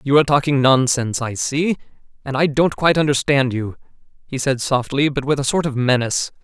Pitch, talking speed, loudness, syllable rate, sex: 135 Hz, 195 wpm, -18 LUFS, 5.9 syllables/s, male